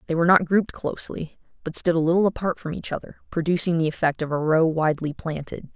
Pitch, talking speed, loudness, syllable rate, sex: 165 Hz, 220 wpm, -23 LUFS, 6.5 syllables/s, female